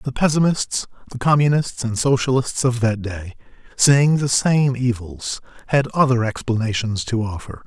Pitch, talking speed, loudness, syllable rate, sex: 125 Hz, 125 wpm, -19 LUFS, 4.6 syllables/s, male